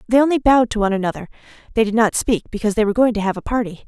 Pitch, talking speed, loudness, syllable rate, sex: 220 Hz, 280 wpm, -18 LUFS, 8.6 syllables/s, female